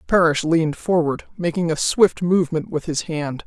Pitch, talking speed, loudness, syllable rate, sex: 165 Hz, 175 wpm, -20 LUFS, 5.0 syllables/s, female